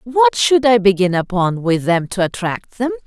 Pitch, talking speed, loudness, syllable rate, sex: 215 Hz, 195 wpm, -16 LUFS, 4.6 syllables/s, female